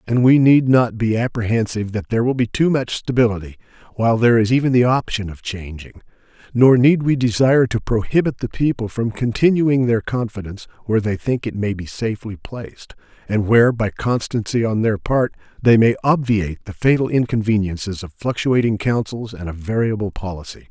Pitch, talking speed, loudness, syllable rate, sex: 115 Hz, 175 wpm, -18 LUFS, 5.7 syllables/s, male